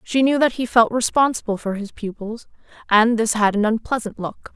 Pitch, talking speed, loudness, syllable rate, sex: 225 Hz, 195 wpm, -19 LUFS, 5.2 syllables/s, female